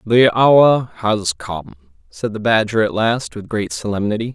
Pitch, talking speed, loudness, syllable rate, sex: 105 Hz, 165 wpm, -17 LUFS, 4.1 syllables/s, male